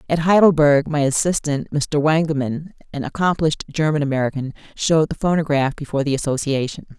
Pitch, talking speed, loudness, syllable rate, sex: 150 Hz, 135 wpm, -19 LUFS, 5.9 syllables/s, female